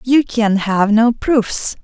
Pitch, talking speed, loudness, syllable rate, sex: 230 Hz, 165 wpm, -15 LUFS, 3.1 syllables/s, female